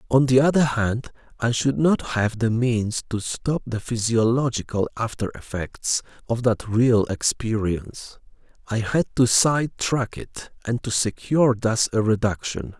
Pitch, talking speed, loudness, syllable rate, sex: 120 Hz, 145 wpm, -22 LUFS, 4.3 syllables/s, male